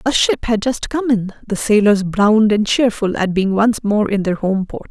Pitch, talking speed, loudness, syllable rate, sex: 215 Hz, 230 wpm, -16 LUFS, 4.7 syllables/s, female